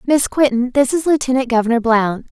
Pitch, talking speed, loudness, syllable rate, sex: 255 Hz, 175 wpm, -16 LUFS, 5.6 syllables/s, female